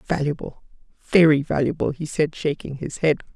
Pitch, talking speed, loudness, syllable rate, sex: 150 Hz, 145 wpm, -22 LUFS, 5.0 syllables/s, female